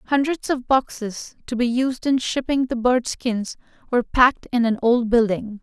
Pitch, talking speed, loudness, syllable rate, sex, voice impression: 245 Hz, 180 wpm, -21 LUFS, 4.5 syllables/s, female, feminine, very adult-like, slightly clear, slightly intellectual, elegant, slightly strict